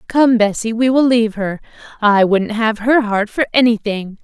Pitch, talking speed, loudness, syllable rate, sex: 225 Hz, 185 wpm, -15 LUFS, 4.8 syllables/s, female